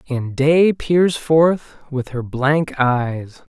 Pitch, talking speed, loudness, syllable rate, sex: 140 Hz, 135 wpm, -18 LUFS, 2.6 syllables/s, male